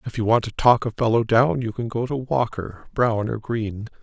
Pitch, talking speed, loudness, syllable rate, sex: 115 Hz, 240 wpm, -22 LUFS, 4.9 syllables/s, male